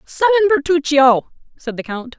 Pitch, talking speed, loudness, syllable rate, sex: 300 Hz, 135 wpm, -15 LUFS, 4.4 syllables/s, female